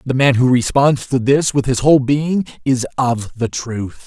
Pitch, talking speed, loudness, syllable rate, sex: 130 Hz, 205 wpm, -16 LUFS, 4.4 syllables/s, male